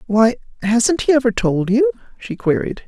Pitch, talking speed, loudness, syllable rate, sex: 240 Hz, 165 wpm, -17 LUFS, 4.7 syllables/s, female